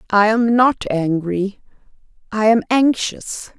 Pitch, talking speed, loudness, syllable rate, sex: 215 Hz, 100 wpm, -17 LUFS, 3.5 syllables/s, female